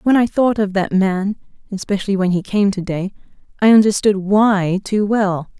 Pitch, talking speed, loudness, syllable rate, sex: 200 Hz, 150 wpm, -16 LUFS, 4.8 syllables/s, female